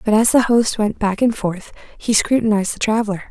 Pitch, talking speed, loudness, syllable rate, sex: 215 Hz, 220 wpm, -17 LUFS, 5.7 syllables/s, female